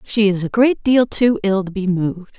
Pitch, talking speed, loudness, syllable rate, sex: 205 Hz, 250 wpm, -17 LUFS, 4.9 syllables/s, female